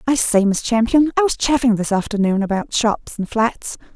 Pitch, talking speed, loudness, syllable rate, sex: 230 Hz, 195 wpm, -18 LUFS, 5.0 syllables/s, female